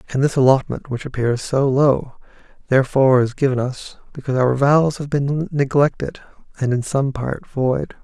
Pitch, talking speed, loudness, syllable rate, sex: 135 Hz, 165 wpm, -19 LUFS, 4.9 syllables/s, male